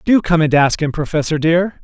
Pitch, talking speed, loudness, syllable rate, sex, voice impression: 165 Hz, 230 wpm, -15 LUFS, 5.2 syllables/s, male, masculine, adult-like, bright, clear, fluent, intellectual, sincere, friendly, reassuring, lively, kind